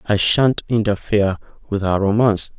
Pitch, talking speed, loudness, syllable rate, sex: 105 Hz, 140 wpm, -18 LUFS, 5.4 syllables/s, male